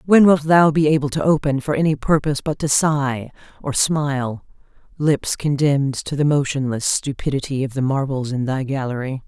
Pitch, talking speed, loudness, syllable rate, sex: 140 Hz, 175 wpm, -19 LUFS, 5.2 syllables/s, female